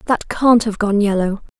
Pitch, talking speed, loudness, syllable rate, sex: 215 Hz, 190 wpm, -16 LUFS, 4.7 syllables/s, female